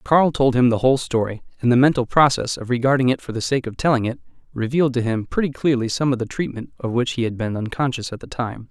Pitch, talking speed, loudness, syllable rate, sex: 125 Hz, 255 wpm, -20 LUFS, 6.4 syllables/s, male